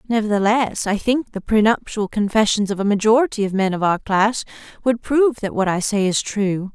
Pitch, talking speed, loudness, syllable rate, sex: 215 Hz, 205 wpm, -19 LUFS, 5.3 syllables/s, female